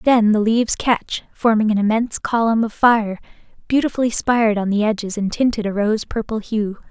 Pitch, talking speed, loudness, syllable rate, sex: 220 Hz, 185 wpm, -18 LUFS, 5.3 syllables/s, female